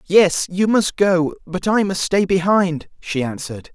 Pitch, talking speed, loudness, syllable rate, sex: 180 Hz, 175 wpm, -18 LUFS, 4.1 syllables/s, male